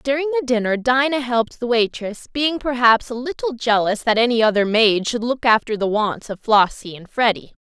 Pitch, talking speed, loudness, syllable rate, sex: 240 Hz, 195 wpm, -18 LUFS, 5.2 syllables/s, female